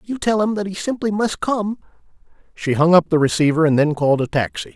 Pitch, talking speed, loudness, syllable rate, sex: 175 Hz, 225 wpm, -18 LUFS, 5.9 syllables/s, male